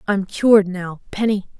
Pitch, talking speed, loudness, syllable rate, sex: 200 Hz, 150 wpm, -18 LUFS, 5.1 syllables/s, female